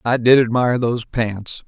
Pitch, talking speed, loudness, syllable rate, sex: 120 Hz, 180 wpm, -17 LUFS, 5.4 syllables/s, male